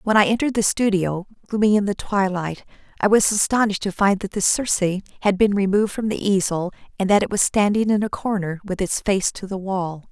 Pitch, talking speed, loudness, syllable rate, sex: 200 Hz, 220 wpm, -20 LUFS, 5.8 syllables/s, female